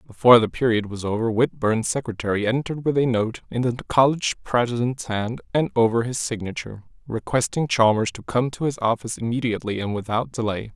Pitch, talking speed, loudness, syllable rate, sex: 120 Hz, 175 wpm, -22 LUFS, 6.0 syllables/s, male